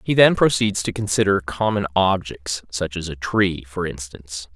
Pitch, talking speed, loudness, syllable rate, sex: 90 Hz, 170 wpm, -21 LUFS, 4.7 syllables/s, male